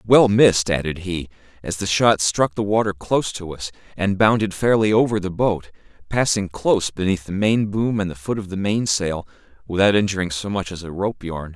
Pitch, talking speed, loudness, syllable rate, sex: 95 Hz, 195 wpm, -20 LUFS, 5.3 syllables/s, male